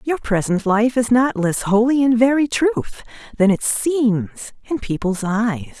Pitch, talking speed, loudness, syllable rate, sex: 230 Hz, 165 wpm, -18 LUFS, 4.1 syllables/s, female